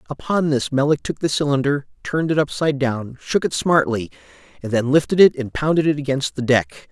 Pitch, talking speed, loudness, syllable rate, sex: 145 Hz, 200 wpm, -19 LUFS, 5.7 syllables/s, male